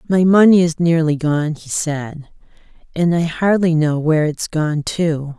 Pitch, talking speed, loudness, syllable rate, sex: 160 Hz, 165 wpm, -16 LUFS, 4.1 syllables/s, female